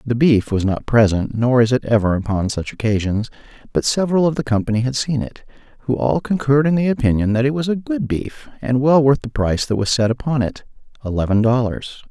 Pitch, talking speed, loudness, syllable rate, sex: 125 Hz, 215 wpm, -18 LUFS, 5.8 syllables/s, male